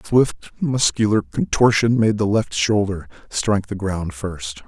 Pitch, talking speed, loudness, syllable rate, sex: 105 Hz, 155 wpm, -20 LUFS, 4.2 syllables/s, male